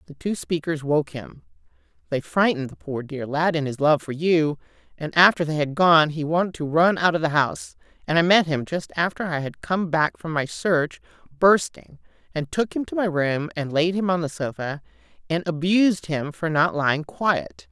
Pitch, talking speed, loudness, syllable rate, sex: 160 Hz, 210 wpm, -22 LUFS, 5.0 syllables/s, female